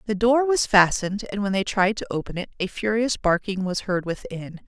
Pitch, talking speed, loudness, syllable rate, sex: 200 Hz, 220 wpm, -23 LUFS, 5.3 syllables/s, female